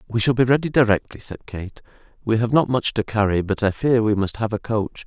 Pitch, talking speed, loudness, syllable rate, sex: 110 Hz, 250 wpm, -20 LUFS, 5.8 syllables/s, male